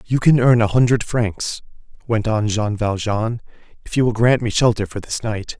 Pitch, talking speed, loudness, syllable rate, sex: 110 Hz, 205 wpm, -18 LUFS, 4.8 syllables/s, male